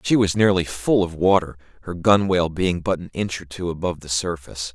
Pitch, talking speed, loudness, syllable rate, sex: 90 Hz, 215 wpm, -21 LUFS, 5.8 syllables/s, male